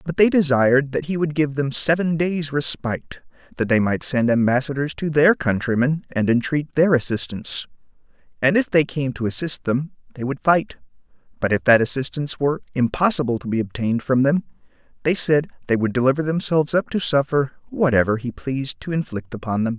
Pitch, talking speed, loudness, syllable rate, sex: 135 Hz, 180 wpm, -21 LUFS, 5.7 syllables/s, male